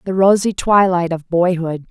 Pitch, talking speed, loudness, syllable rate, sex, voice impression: 180 Hz, 160 wpm, -15 LUFS, 4.6 syllables/s, female, very feminine, very adult-like, slightly calm, slightly elegant